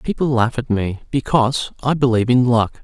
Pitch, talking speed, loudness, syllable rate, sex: 125 Hz, 190 wpm, -18 LUFS, 5.5 syllables/s, male